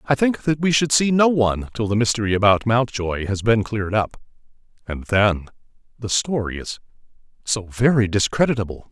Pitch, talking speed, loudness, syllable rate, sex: 115 Hz, 170 wpm, -20 LUFS, 5.3 syllables/s, male